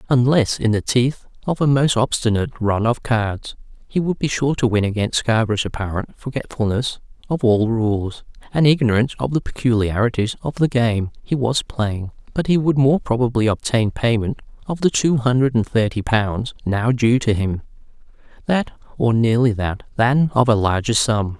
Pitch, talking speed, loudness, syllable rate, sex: 120 Hz, 170 wpm, -19 LUFS, 4.9 syllables/s, male